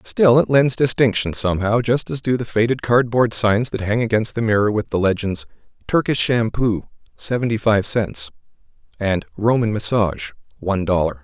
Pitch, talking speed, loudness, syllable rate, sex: 110 Hz, 160 wpm, -19 LUFS, 5.2 syllables/s, male